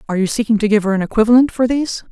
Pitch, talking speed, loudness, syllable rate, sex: 220 Hz, 285 wpm, -15 LUFS, 8.4 syllables/s, female